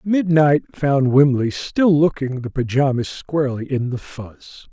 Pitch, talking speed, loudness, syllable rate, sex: 140 Hz, 140 wpm, -18 LUFS, 4.0 syllables/s, male